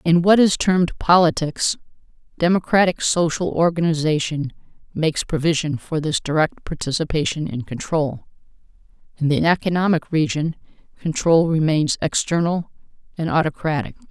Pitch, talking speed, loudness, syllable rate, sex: 165 Hz, 105 wpm, -20 LUFS, 5.1 syllables/s, female